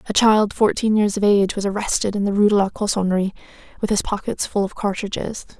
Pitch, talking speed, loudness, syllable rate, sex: 205 Hz, 215 wpm, -20 LUFS, 6.2 syllables/s, female